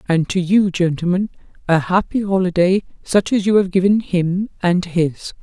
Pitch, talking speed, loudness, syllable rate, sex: 185 Hz, 165 wpm, -17 LUFS, 4.7 syllables/s, female